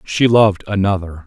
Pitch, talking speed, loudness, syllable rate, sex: 100 Hz, 140 wpm, -15 LUFS, 5.3 syllables/s, male